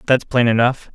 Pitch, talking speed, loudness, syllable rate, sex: 120 Hz, 190 wpm, -16 LUFS, 5.1 syllables/s, male